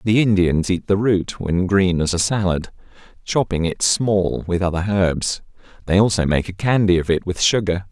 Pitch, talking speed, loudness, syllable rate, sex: 95 Hz, 190 wpm, -19 LUFS, 4.7 syllables/s, male